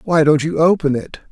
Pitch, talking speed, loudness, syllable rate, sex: 155 Hz, 230 wpm, -16 LUFS, 5.3 syllables/s, male